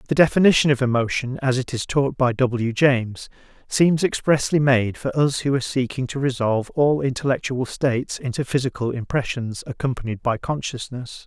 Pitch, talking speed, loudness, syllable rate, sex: 130 Hz, 160 wpm, -21 LUFS, 5.3 syllables/s, male